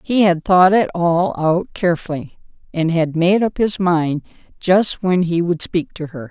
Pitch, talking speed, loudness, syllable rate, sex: 175 Hz, 190 wpm, -17 LUFS, 4.2 syllables/s, female